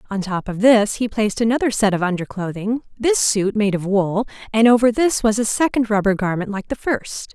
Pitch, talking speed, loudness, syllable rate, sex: 215 Hz, 220 wpm, -19 LUFS, 5.4 syllables/s, female